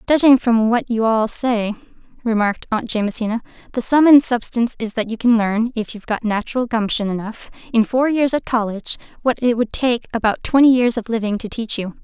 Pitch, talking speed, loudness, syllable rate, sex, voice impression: 230 Hz, 195 wpm, -18 LUFS, 5.7 syllables/s, female, feminine, slightly young, slightly fluent, cute, slightly calm, friendly